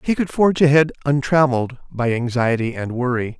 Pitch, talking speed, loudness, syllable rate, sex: 135 Hz, 160 wpm, -19 LUFS, 5.6 syllables/s, male